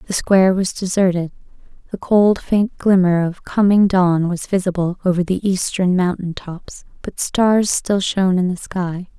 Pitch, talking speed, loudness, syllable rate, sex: 185 Hz, 165 wpm, -17 LUFS, 4.5 syllables/s, female